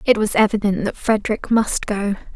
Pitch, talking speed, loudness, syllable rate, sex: 210 Hz, 180 wpm, -19 LUFS, 5.3 syllables/s, female